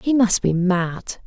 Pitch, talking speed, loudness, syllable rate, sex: 200 Hz, 190 wpm, -19 LUFS, 3.4 syllables/s, female